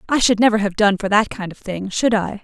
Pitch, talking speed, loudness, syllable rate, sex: 210 Hz, 295 wpm, -18 LUFS, 5.7 syllables/s, female